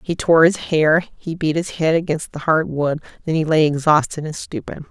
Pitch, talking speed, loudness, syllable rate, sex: 160 Hz, 220 wpm, -18 LUFS, 4.9 syllables/s, female